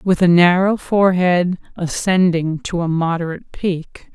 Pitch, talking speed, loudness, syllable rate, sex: 180 Hz, 130 wpm, -17 LUFS, 4.4 syllables/s, female